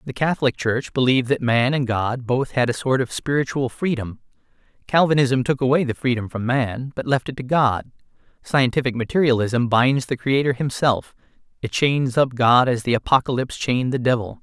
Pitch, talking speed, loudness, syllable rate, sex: 130 Hz, 180 wpm, -20 LUFS, 5.3 syllables/s, male